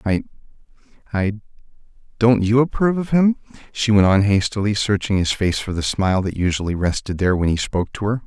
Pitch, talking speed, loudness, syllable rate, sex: 105 Hz, 175 wpm, -19 LUFS, 6.2 syllables/s, male